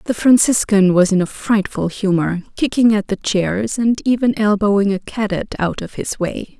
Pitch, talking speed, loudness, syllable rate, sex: 205 Hz, 180 wpm, -17 LUFS, 4.7 syllables/s, female